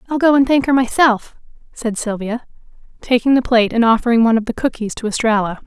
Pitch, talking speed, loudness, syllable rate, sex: 235 Hz, 200 wpm, -16 LUFS, 6.4 syllables/s, female